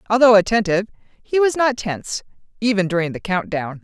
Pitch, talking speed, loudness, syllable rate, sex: 210 Hz, 155 wpm, -19 LUFS, 6.0 syllables/s, female